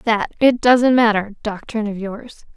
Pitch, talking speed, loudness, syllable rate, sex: 220 Hz, 165 wpm, -17 LUFS, 4.4 syllables/s, female